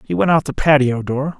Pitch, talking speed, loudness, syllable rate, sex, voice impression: 140 Hz, 260 wpm, -16 LUFS, 5.4 syllables/s, male, very masculine, very adult-like, slightly old, very thick, slightly tensed, powerful, slightly bright, hard, slightly muffled, fluent, cool, intellectual, slightly refreshing, very sincere, calm, very mature, very friendly, very reassuring, unique, wild, sweet, very kind